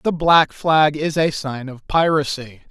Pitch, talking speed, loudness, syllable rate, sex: 150 Hz, 175 wpm, -18 LUFS, 3.9 syllables/s, male